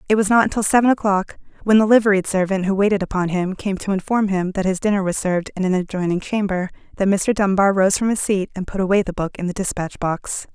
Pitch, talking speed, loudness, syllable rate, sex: 195 Hz, 245 wpm, -19 LUFS, 6.1 syllables/s, female